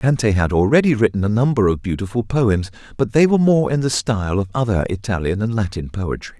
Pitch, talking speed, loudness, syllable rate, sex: 110 Hz, 205 wpm, -18 LUFS, 6.0 syllables/s, male